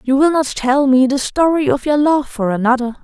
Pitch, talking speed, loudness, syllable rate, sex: 270 Hz, 235 wpm, -15 LUFS, 5.2 syllables/s, female